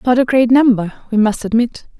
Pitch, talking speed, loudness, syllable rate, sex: 235 Hz, 210 wpm, -14 LUFS, 5.6 syllables/s, female